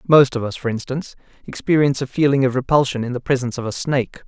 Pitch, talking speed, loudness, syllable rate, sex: 130 Hz, 225 wpm, -19 LUFS, 7.0 syllables/s, male